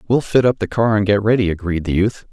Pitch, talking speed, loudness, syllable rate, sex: 105 Hz, 285 wpm, -17 LUFS, 6.2 syllables/s, male